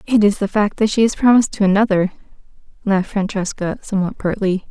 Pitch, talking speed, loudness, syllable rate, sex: 200 Hz, 180 wpm, -17 LUFS, 6.3 syllables/s, female